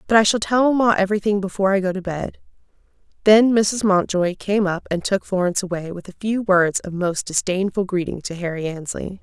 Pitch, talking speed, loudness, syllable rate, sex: 195 Hz, 200 wpm, -20 LUFS, 5.8 syllables/s, female